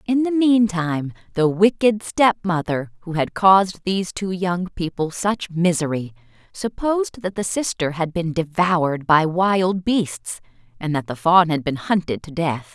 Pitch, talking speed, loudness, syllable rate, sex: 175 Hz, 160 wpm, -20 LUFS, 4.4 syllables/s, female